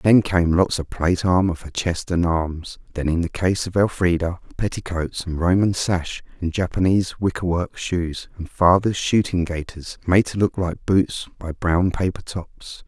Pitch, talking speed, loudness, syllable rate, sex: 90 Hz, 170 wpm, -21 LUFS, 4.4 syllables/s, male